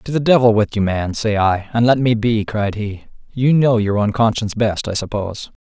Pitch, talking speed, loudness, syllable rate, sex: 110 Hz, 235 wpm, -17 LUFS, 5.1 syllables/s, male